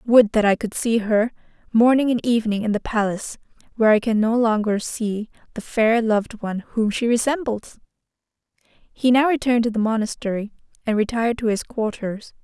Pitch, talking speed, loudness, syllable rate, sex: 225 Hz, 175 wpm, -21 LUFS, 5.5 syllables/s, female